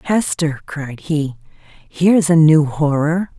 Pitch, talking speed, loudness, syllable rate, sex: 155 Hz, 140 wpm, -16 LUFS, 4.1 syllables/s, female